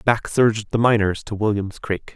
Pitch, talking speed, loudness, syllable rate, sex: 105 Hz, 195 wpm, -20 LUFS, 4.9 syllables/s, male